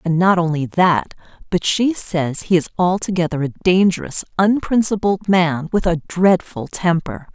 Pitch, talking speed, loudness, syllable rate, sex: 180 Hz, 145 wpm, -18 LUFS, 4.5 syllables/s, female